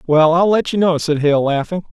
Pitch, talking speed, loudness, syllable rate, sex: 165 Hz, 240 wpm, -15 LUFS, 5.1 syllables/s, male